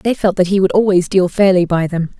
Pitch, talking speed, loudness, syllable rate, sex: 185 Hz, 275 wpm, -14 LUFS, 5.7 syllables/s, female